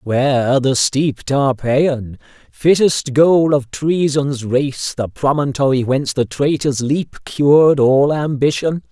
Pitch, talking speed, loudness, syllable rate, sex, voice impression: 140 Hz, 115 wpm, -16 LUFS, 3.6 syllables/s, male, masculine, middle-aged, tensed, powerful, slightly bright, slightly soft, slightly raspy, calm, mature, friendly, slightly unique, wild, lively